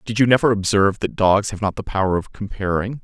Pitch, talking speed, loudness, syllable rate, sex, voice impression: 105 Hz, 235 wpm, -19 LUFS, 6.1 syllables/s, male, very masculine, very adult-like, cool, sincere, slightly mature, elegant, slightly sweet